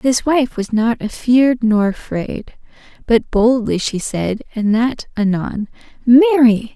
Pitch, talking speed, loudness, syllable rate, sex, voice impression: 235 Hz, 135 wpm, -16 LUFS, 3.9 syllables/s, female, feminine, adult-like, relaxed, powerful, bright, soft, slightly halting, calm, friendly, reassuring, elegant, lively